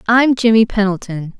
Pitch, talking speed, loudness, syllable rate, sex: 210 Hz, 130 wpm, -14 LUFS, 4.9 syllables/s, female